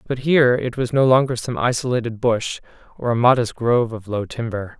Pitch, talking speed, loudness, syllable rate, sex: 120 Hz, 200 wpm, -19 LUFS, 5.7 syllables/s, male